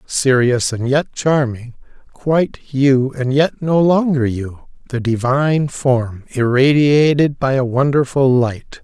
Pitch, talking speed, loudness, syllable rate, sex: 135 Hz, 130 wpm, -16 LUFS, 3.8 syllables/s, male